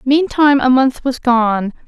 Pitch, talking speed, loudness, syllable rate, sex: 260 Hz, 160 wpm, -14 LUFS, 4.2 syllables/s, female